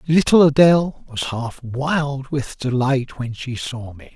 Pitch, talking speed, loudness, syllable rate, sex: 135 Hz, 160 wpm, -19 LUFS, 3.8 syllables/s, male